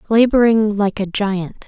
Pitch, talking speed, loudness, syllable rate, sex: 210 Hz, 145 wpm, -16 LUFS, 4.0 syllables/s, female